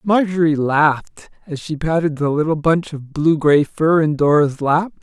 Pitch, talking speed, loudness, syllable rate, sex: 155 Hz, 180 wpm, -17 LUFS, 4.5 syllables/s, male